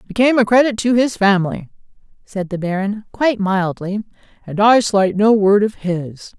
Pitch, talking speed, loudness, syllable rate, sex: 205 Hz, 170 wpm, -16 LUFS, 5.0 syllables/s, female